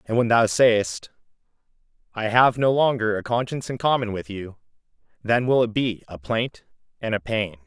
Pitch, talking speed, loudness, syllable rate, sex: 115 Hz, 180 wpm, -22 LUFS, 5.0 syllables/s, male